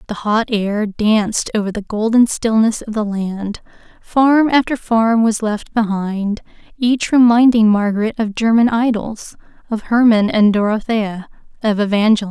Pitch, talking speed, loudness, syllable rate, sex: 220 Hz, 130 wpm, -16 LUFS, 4.5 syllables/s, female